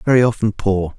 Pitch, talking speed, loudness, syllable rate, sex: 105 Hz, 185 wpm, -17 LUFS, 5.8 syllables/s, male